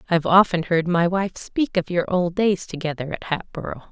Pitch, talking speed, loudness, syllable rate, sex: 175 Hz, 200 wpm, -21 LUFS, 5.2 syllables/s, female